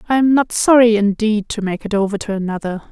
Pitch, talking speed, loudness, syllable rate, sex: 215 Hz, 225 wpm, -16 LUFS, 6.0 syllables/s, female